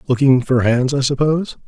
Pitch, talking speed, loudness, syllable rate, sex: 135 Hz, 180 wpm, -16 LUFS, 5.5 syllables/s, male